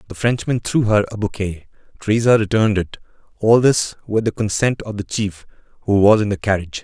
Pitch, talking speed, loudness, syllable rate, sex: 105 Hz, 185 wpm, -18 LUFS, 5.9 syllables/s, male